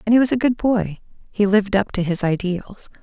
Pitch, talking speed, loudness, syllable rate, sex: 205 Hz, 240 wpm, -19 LUFS, 5.6 syllables/s, female